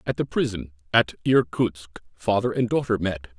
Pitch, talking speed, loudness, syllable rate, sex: 100 Hz, 160 wpm, -24 LUFS, 4.7 syllables/s, male